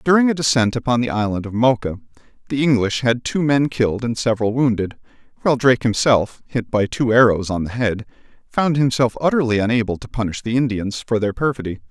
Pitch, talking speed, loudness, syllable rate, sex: 120 Hz, 190 wpm, -19 LUFS, 6.0 syllables/s, male